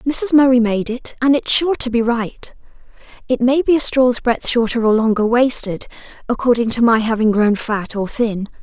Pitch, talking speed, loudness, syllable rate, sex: 240 Hz, 195 wpm, -16 LUFS, 4.8 syllables/s, female